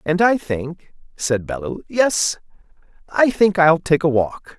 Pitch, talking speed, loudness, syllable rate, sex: 170 Hz, 155 wpm, -18 LUFS, 3.7 syllables/s, male